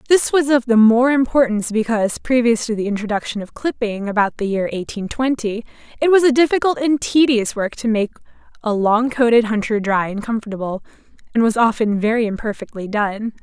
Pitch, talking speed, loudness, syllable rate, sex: 230 Hz, 180 wpm, -18 LUFS, 5.6 syllables/s, female